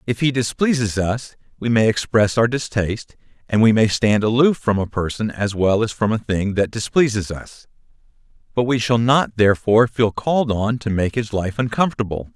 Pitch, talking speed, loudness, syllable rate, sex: 115 Hz, 190 wpm, -19 LUFS, 5.2 syllables/s, male